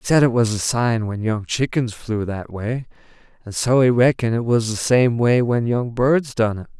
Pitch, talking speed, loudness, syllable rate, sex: 120 Hz, 230 wpm, -19 LUFS, 4.8 syllables/s, male